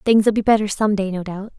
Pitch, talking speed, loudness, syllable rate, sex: 205 Hz, 265 wpm, -18 LUFS, 5.5 syllables/s, female